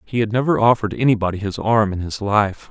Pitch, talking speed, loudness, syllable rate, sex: 110 Hz, 220 wpm, -18 LUFS, 6.2 syllables/s, male